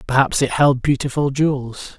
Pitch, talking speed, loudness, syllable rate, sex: 135 Hz, 150 wpm, -18 LUFS, 4.9 syllables/s, male